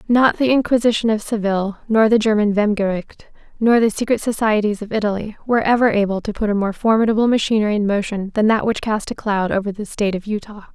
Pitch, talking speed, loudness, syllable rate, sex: 215 Hz, 210 wpm, -18 LUFS, 6.3 syllables/s, female